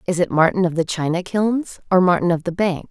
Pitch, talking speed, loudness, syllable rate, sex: 180 Hz, 250 wpm, -19 LUFS, 5.6 syllables/s, female